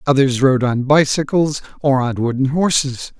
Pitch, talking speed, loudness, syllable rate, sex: 135 Hz, 150 wpm, -16 LUFS, 4.6 syllables/s, male